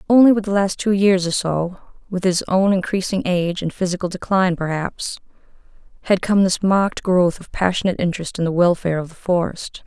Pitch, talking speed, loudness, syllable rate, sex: 185 Hz, 175 wpm, -19 LUFS, 5.8 syllables/s, female